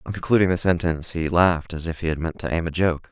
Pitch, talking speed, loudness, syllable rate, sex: 85 Hz, 290 wpm, -22 LUFS, 6.7 syllables/s, male